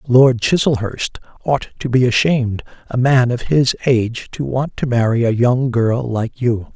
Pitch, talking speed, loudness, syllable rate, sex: 125 Hz, 180 wpm, -17 LUFS, 4.4 syllables/s, male